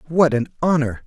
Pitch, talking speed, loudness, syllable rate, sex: 145 Hz, 170 wpm, -19 LUFS, 5.3 syllables/s, male